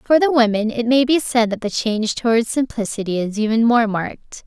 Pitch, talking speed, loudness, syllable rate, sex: 230 Hz, 215 wpm, -18 LUFS, 5.5 syllables/s, female